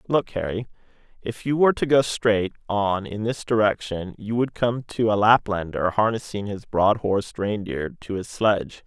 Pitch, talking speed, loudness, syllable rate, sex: 105 Hz, 175 wpm, -23 LUFS, 4.8 syllables/s, male